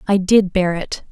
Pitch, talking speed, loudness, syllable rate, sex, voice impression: 190 Hz, 215 wpm, -17 LUFS, 4.4 syllables/s, female, very feminine, very young, very thin, tensed, powerful, bright, slightly soft, very clear, very fluent, slightly halting, very cute, intellectual, very refreshing, sincere, calm, friendly, reassuring, very unique, elegant, slightly wild, slightly sweet, slightly lively, very kind